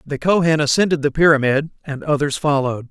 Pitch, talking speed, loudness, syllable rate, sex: 150 Hz, 165 wpm, -17 LUFS, 6.0 syllables/s, male